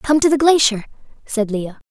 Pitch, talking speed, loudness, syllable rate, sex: 255 Hz, 190 wpm, -16 LUFS, 5.3 syllables/s, female